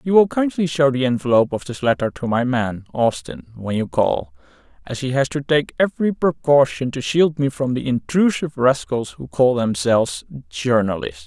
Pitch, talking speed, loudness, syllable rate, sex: 130 Hz, 180 wpm, -19 LUFS, 5.1 syllables/s, male